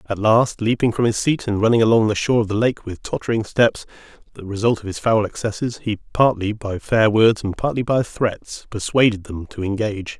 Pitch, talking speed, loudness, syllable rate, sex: 110 Hz, 210 wpm, -19 LUFS, 5.4 syllables/s, male